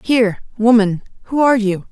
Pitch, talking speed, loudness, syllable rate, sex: 225 Hz, 155 wpm, -15 LUFS, 6.0 syllables/s, female